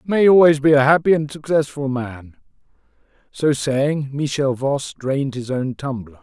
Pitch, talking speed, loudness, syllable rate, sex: 140 Hz, 165 wpm, -18 LUFS, 4.8 syllables/s, male